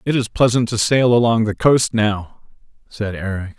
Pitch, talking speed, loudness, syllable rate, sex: 110 Hz, 185 wpm, -17 LUFS, 4.7 syllables/s, male